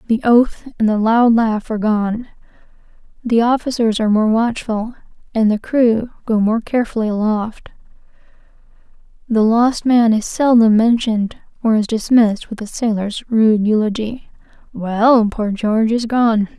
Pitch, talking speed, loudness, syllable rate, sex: 225 Hz, 135 wpm, -16 LUFS, 4.6 syllables/s, female